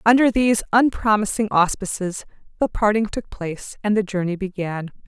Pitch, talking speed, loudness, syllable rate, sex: 205 Hz, 140 wpm, -21 LUFS, 5.3 syllables/s, female